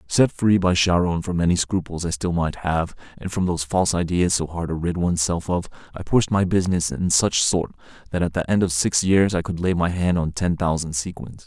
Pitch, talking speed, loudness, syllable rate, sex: 85 Hz, 240 wpm, -21 LUFS, 5.5 syllables/s, male